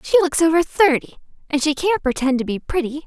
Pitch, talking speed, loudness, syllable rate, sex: 305 Hz, 215 wpm, -19 LUFS, 5.8 syllables/s, female